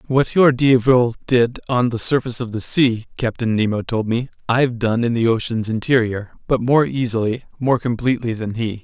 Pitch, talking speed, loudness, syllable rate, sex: 120 Hz, 185 wpm, -19 LUFS, 5.3 syllables/s, male